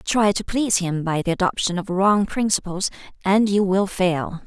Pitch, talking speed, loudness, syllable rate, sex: 190 Hz, 190 wpm, -21 LUFS, 4.8 syllables/s, female